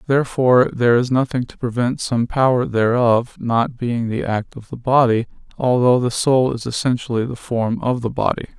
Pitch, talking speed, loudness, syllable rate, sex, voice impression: 120 Hz, 180 wpm, -18 LUFS, 5.0 syllables/s, male, masculine, adult-like, relaxed, weak, slightly dark, muffled, calm, friendly, reassuring, kind, modest